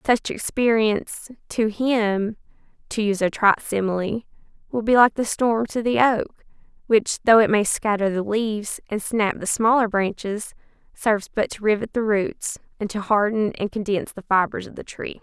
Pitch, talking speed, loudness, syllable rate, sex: 215 Hz, 175 wpm, -22 LUFS, 4.4 syllables/s, female